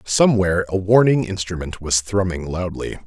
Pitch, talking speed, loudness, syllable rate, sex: 95 Hz, 135 wpm, -19 LUFS, 5.2 syllables/s, male